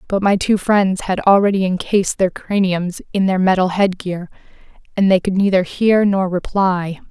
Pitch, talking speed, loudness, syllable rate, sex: 190 Hz, 170 wpm, -16 LUFS, 4.8 syllables/s, female